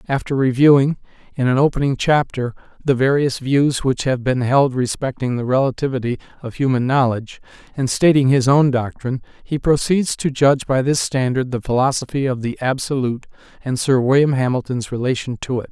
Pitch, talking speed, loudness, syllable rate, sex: 130 Hz, 165 wpm, -18 LUFS, 5.5 syllables/s, male